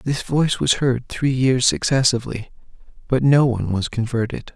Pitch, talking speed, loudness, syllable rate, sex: 125 Hz, 160 wpm, -19 LUFS, 5.2 syllables/s, male